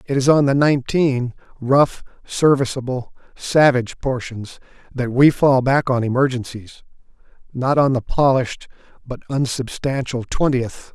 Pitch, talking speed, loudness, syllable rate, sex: 130 Hz, 120 wpm, -18 LUFS, 4.6 syllables/s, male